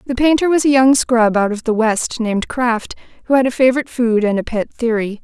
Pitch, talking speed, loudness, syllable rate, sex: 240 Hz, 240 wpm, -16 LUFS, 5.7 syllables/s, female